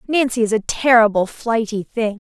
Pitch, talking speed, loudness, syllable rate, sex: 225 Hz, 160 wpm, -17 LUFS, 4.9 syllables/s, female